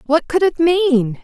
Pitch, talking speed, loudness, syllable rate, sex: 305 Hz, 195 wpm, -15 LUFS, 3.7 syllables/s, female